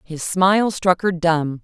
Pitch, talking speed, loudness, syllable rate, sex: 175 Hz, 185 wpm, -18 LUFS, 3.9 syllables/s, female